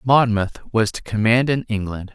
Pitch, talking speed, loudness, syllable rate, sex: 110 Hz, 170 wpm, -20 LUFS, 4.5 syllables/s, male